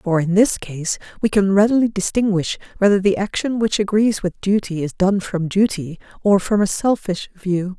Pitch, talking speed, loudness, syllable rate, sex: 195 Hz, 185 wpm, -19 LUFS, 4.8 syllables/s, female